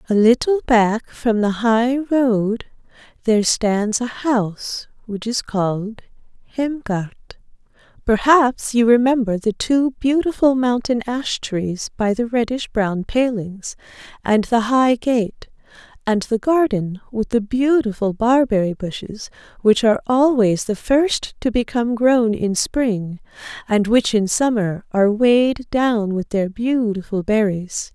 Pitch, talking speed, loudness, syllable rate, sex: 230 Hz, 135 wpm, -18 LUFS, 3.9 syllables/s, female